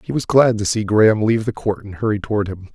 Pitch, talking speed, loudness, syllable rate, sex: 105 Hz, 285 wpm, -18 LUFS, 6.9 syllables/s, male